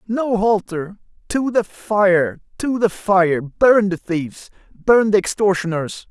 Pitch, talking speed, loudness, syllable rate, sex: 195 Hz, 140 wpm, -18 LUFS, 3.6 syllables/s, male